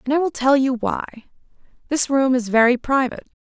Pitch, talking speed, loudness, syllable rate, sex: 260 Hz, 190 wpm, -19 LUFS, 6.0 syllables/s, female